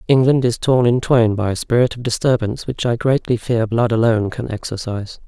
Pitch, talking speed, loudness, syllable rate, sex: 115 Hz, 205 wpm, -18 LUFS, 5.7 syllables/s, male